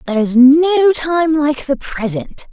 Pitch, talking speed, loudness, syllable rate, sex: 285 Hz, 165 wpm, -13 LUFS, 3.8 syllables/s, female